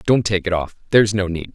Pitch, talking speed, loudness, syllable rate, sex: 95 Hz, 270 wpm, -19 LUFS, 6.4 syllables/s, male